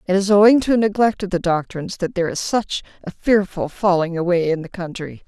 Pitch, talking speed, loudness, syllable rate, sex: 185 Hz, 225 wpm, -19 LUFS, 5.9 syllables/s, female